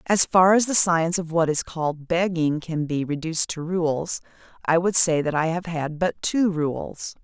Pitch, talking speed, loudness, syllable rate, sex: 165 Hz, 205 wpm, -22 LUFS, 4.6 syllables/s, female